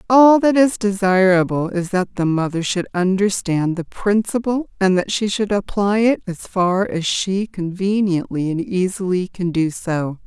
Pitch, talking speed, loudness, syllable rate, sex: 190 Hz, 165 wpm, -18 LUFS, 4.3 syllables/s, female